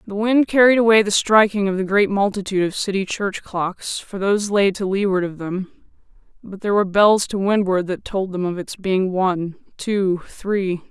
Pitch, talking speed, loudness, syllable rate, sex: 195 Hz, 185 wpm, -19 LUFS, 5.0 syllables/s, female